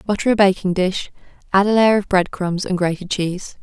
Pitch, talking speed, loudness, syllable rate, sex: 190 Hz, 215 wpm, -18 LUFS, 5.5 syllables/s, female